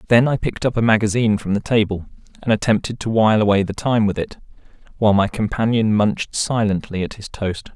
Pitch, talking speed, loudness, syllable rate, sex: 110 Hz, 200 wpm, -19 LUFS, 6.2 syllables/s, male